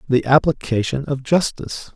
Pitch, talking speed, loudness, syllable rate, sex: 135 Hz, 125 wpm, -19 LUFS, 5.0 syllables/s, male